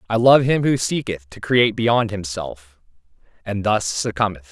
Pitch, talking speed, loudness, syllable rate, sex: 105 Hz, 160 wpm, -19 LUFS, 4.8 syllables/s, male